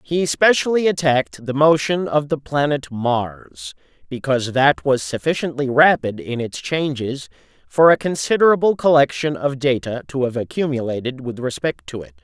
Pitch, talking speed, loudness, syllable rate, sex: 140 Hz, 145 wpm, -19 LUFS, 4.9 syllables/s, male